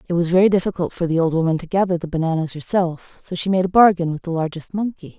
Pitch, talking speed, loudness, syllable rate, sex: 175 Hz, 255 wpm, -19 LUFS, 6.6 syllables/s, female